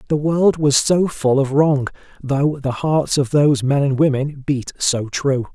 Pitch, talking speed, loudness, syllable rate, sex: 140 Hz, 195 wpm, -18 LUFS, 4.1 syllables/s, male